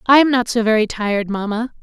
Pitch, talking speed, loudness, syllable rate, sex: 230 Hz, 230 wpm, -17 LUFS, 6.1 syllables/s, female